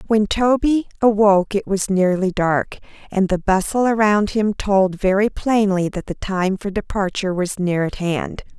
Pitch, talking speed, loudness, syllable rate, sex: 200 Hz, 170 wpm, -19 LUFS, 4.5 syllables/s, female